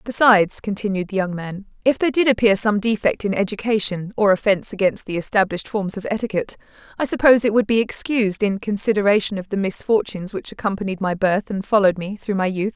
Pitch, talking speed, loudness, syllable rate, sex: 205 Hz, 200 wpm, -20 LUFS, 6.4 syllables/s, female